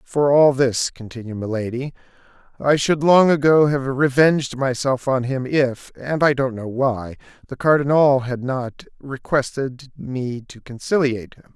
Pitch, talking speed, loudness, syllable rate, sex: 135 Hz, 150 wpm, -19 LUFS, 4.3 syllables/s, male